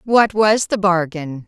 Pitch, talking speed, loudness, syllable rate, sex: 190 Hz, 165 wpm, -16 LUFS, 3.7 syllables/s, female